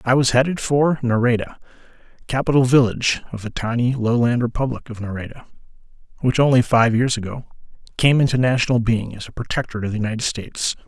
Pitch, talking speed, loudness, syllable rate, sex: 120 Hz, 165 wpm, -19 LUFS, 6.4 syllables/s, male